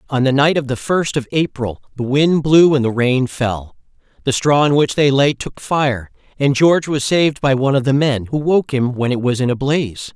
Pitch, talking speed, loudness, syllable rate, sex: 135 Hz, 250 wpm, -16 LUFS, 5.2 syllables/s, male